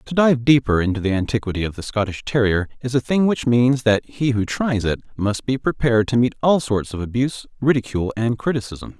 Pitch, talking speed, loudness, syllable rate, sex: 120 Hz, 215 wpm, -20 LUFS, 5.7 syllables/s, male